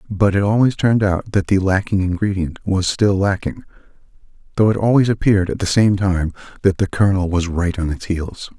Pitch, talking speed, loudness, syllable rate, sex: 95 Hz, 190 wpm, -18 LUFS, 5.5 syllables/s, male